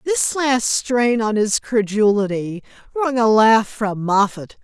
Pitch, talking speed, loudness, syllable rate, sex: 225 Hz, 140 wpm, -18 LUFS, 3.6 syllables/s, female